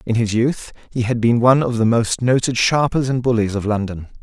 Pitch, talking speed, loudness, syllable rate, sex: 120 Hz, 225 wpm, -18 LUFS, 5.5 syllables/s, male